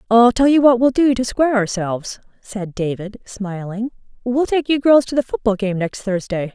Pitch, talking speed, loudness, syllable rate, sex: 230 Hz, 200 wpm, -18 LUFS, 5.0 syllables/s, female